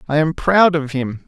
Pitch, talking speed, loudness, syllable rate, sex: 150 Hz, 235 wpm, -16 LUFS, 4.5 syllables/s, male